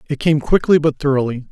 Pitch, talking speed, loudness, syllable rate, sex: 145 Hz, 200 wpm, -16 LUFS, 6.2 syllables/s, male